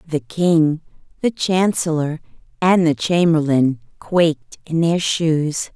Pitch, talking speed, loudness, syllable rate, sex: 160 Hz, 115 wpm, -18 LUFS, 3.5 syllables/s, female